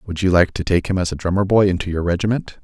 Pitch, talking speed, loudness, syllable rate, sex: 90 Hz, 295 wpm, -18 LUFS, 6.6 syllables/s, male